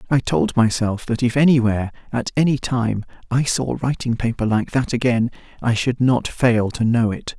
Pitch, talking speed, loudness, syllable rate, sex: 120 Hz, 185 wpm, -20 LUFS, 4.9 syllables/s, male